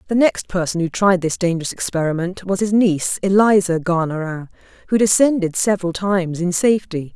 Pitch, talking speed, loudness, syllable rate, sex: 185 Hz, 160 wpm, -18 LUFS, 5.7 syllables/s, female